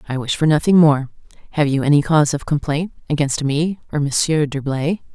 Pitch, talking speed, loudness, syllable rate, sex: 150 Hz, 185 wpm, -18 LUFS, 5.6 syllables/s, female